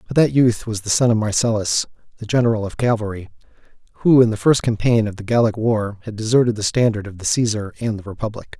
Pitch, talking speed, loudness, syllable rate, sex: 110 Hz, 215 wpm, -19 LUFS, 6.2 syllables/s, male